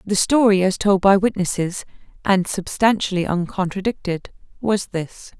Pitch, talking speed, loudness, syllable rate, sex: 195 Hz, 120 wpm, -20 LUFS, 4.7 syllables/s, female